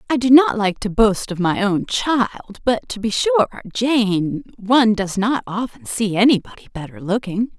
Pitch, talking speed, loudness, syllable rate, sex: 220 Hz, 175 wpm, -18 LUFS, 4.5 syllables/s, female